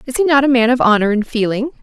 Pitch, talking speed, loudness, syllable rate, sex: 245 Hz, 295 wpm, -14 LUFS, 6.9 syllables/s, female